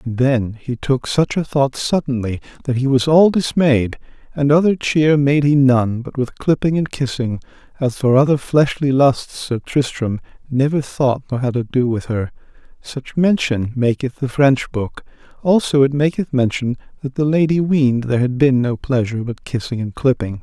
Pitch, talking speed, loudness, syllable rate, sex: 135 Hz, 180 wpm, -17 LUFS, 4.7 syllables/s, male